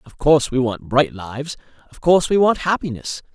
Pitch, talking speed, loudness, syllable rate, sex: 140 Hz, 195 wpm, -19 LUFS, 5.7 syllables/s, male